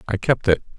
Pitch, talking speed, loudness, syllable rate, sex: 110 Hz, 230 wpm, -20 LUFS, 6.1 syllables/s, male